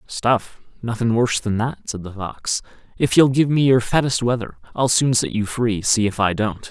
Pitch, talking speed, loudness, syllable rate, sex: 115 Hz, 215 wpm, -20 LUFS, 4.8 syllables/s, male